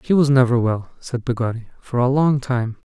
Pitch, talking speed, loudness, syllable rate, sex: 125 Hz, 205 wpm, -19 LUFS, 5.2 syllables/s, male